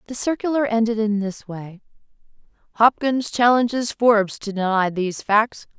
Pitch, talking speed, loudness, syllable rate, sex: 220 Hz, 135 wpm, -20 LUFS, 4.8 syllables/s, female